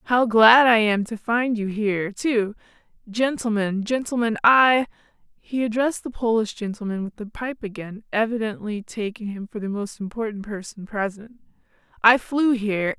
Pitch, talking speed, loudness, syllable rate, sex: 220 Hz, 150 wpm, -22 LUFS, 3.2 syllables/s, female